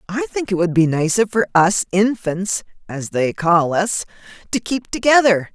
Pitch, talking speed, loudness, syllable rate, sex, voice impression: 195 Hz, 175 wpm, -18 LUFS, 4.4 syllables/s, female, feminine, adult-like, tensed, powerful, slightly hard, clear, slightly raspy, intellectual, calm, elegant, lively, slightly strict, slightly sharp